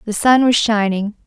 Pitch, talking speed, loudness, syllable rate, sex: 220 Hz, 190 wpm, -15 LUFS, 4.8 syllables/s, female